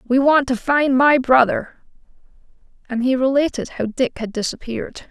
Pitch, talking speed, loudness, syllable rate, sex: 260 Hz, 155 wpm, -18 LUFS, 4.9 syllables/s, female